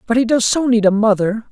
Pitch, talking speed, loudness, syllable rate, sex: 225 Hz, 280 wpm, -15 LUFS, 5.9 syllables/s, male